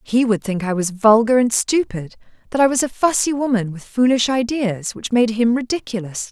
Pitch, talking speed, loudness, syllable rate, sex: 230 Hz, 200 wpm, -18 LUFS, 5.1 syllables/s, female